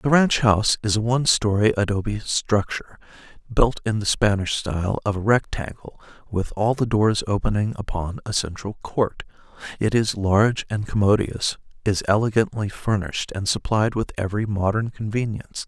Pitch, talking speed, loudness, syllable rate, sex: 105 Hz, 155 wpm, -22 LUFS, 5.1 syllables/s, male